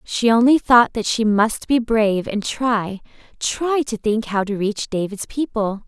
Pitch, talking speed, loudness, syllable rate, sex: 225 Hz, 175 wpm, -19 LUFS, 4.1 syllables/s, female